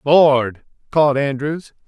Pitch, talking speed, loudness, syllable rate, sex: 140 Hz, 95 wpm, -17 LUFS, 3.6 syllables/s, male